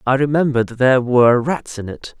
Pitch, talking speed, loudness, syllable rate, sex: 130 Hz, 190 wpm, -16 LUFS, 5.8 syllables/s, male